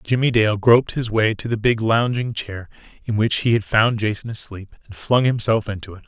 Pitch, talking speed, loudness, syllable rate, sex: 110 Hz, 215 wpm, -19 LUFS, 5.3 syllables/s, male